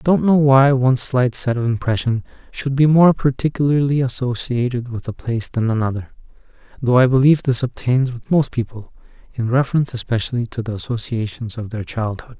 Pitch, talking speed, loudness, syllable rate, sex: 125 Hz, 175 wpm, -18 LUFS, 5.8 syllables/s, male